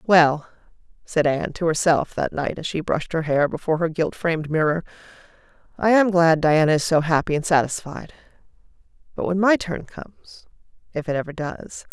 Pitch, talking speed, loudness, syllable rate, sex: 165 Hz, 175 wpm, -21 LUFS, 5.5 syllables/s, female